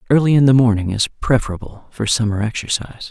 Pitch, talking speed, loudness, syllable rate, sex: 115 Hz, 175 wpm, -17 LUFS, 6.3 syllables/s, male